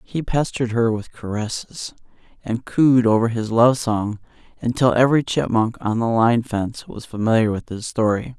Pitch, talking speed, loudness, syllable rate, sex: 115 Hz, 165 wpm, -20 LUFS, 5.0 syllables/s, male